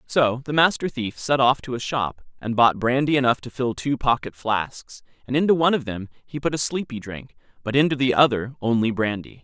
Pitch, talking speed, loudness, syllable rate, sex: 125 Hz, 215 wpm, -22 LUFS, 5.4 syllables/s, male